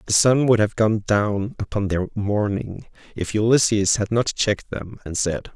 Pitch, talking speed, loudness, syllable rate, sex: 105 Hz, 185 wpm, -21 LUFS, 4.5 syllables/s, male